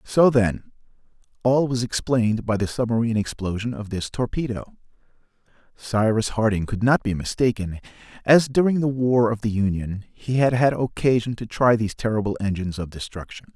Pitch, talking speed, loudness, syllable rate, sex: 115 Hz, 160 wpm, -22 LUFS, 5.5 syllables/s, male